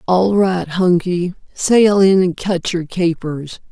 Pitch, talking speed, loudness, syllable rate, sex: 180 Hz, 130 wpm, -16 LUFS, 3.3 syllables/s, female